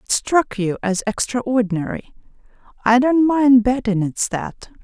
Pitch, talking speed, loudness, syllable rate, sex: 235 Hz, 135 wpm, -18 LUFS, 4.1 syllables/s, female